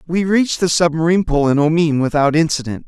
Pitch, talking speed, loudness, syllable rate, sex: 160 Hz, 190 wpm, -16 LUFS, 6.3 syllables/s, male